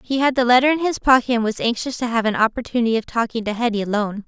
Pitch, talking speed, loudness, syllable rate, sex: 235 Hz, 265 wpm, -19 LUFS, 7.2 syllables/s, female